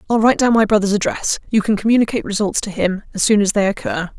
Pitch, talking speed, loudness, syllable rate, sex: 210 Hz, 245 wpm, -17 LUFS, 6.9 syllables/s, female